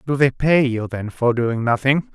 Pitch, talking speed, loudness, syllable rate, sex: 125 Hz, 225 wpm, -19 LUFS, 4.6 syllables/s, male